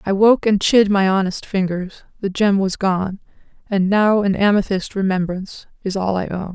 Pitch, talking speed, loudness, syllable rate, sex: 195 Hz, 185 wpm, -18 LUFS, 4.8 syllables/s, female